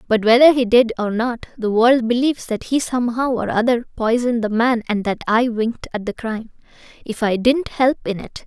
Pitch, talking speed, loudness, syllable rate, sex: 235 Hz, 215 wpm, -18 LUFS, 5.5 syllables/s, female